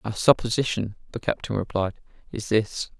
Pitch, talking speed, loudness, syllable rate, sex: 110 Hz, 140 wpm, -25 LUFS, 5.2 syllables/s, male